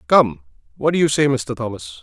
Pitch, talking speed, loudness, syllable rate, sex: 140 Hz, 205 wpm, -19 LUFS, 5.3 syllables/s, male